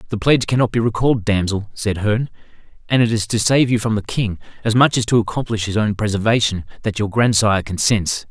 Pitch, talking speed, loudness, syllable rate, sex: 110 Hz, 210 wpm, -18 LUFS, 6.1 syllables/s, male